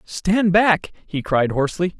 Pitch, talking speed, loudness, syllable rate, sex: 175 Hz, 150 wpm, -19 LUFS, 3.9 syllables/s, male